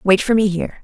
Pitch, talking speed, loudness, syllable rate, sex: 200 Hz, 285 wpm, -16 LUFS, 6.5 syllables/s, female